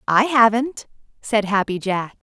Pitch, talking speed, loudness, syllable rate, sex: 220 Hz, 130 wpm, -19 LUFS, 4.1 syllables/s, female